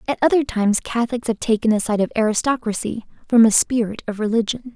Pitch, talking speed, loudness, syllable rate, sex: 225 Hz, 190 wpm, -19 LUFS, 6.4 syllables/s, female